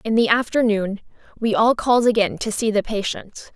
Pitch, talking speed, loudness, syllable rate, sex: 220 Hz, 185 wpm, -20 LUFS, 5.1 syllables/s, female